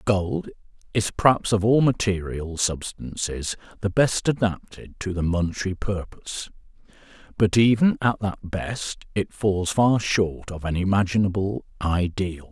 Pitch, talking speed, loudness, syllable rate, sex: 100 Hz, 130 wpm, -24 LUFS, 4.2 syllables/s, male